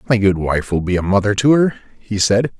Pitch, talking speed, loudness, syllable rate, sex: 105 Hz, 255 wpm, -16 LUFS, 5.7 syllables/s, male